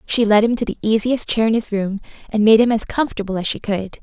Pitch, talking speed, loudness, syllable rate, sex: 215 Hz, 270 wpm, -18 LUFS, 6.2 syllables/s, female